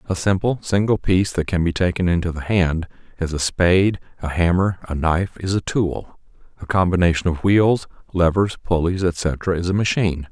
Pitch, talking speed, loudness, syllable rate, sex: 90 Hz, 180 wpm, -20 LUFS, 5.3 syllables/s, male